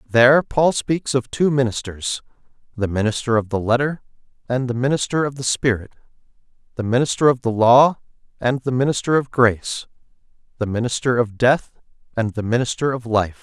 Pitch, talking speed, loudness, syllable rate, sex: 125 Hz, 160 wpm, -19 LUFS, 5.4 syllables/s, male